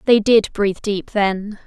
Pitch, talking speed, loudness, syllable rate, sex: 205 Hz, 180 wpm, -18 LUFS, 4.1 syllables/s, female